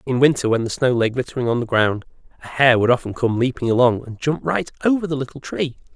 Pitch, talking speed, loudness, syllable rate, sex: 130 Hz, 240 wpm, -19 LUFS, 6.3 syllables/s, male